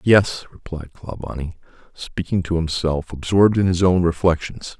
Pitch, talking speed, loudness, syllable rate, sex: 85 Hz, 140 wpm, -20 LUFS, 4.8 syllables/s, male